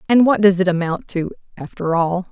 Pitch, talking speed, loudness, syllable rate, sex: 185 Hz, 205 wpm, -17 LUFS, 5.4 syllables/s, female